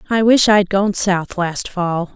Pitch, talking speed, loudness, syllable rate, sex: 190 Hz, 195 wpm, -16 LUFS, 3.6 syllables/s, female